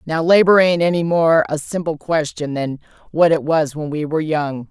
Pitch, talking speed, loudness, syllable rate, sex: 160 Hz, 205 wpm, -17 LUFS, 4.9 syllables/s, female